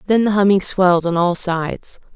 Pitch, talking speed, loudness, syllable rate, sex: 185 Hz, 195 wpm, -16 LUFS, 5.4 syllables/s, female